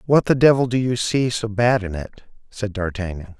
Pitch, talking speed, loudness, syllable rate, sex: 110 Hz, 210 wpm, -20 LUFS, 5.3 syllables/s, male